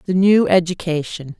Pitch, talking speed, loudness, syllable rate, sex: 175 Hz, 130 wpm, -17 LUFS, 4.9 syllables/s, female